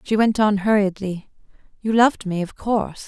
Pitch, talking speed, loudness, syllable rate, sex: 205 Hz, 175 wpm, -20 LUFS, 5.3 syllables/s, female